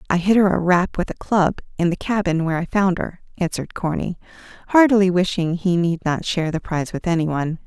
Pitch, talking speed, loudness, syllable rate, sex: 180 Hz, 220 wpm, -20 LUFS, 6.1 syllables/s, female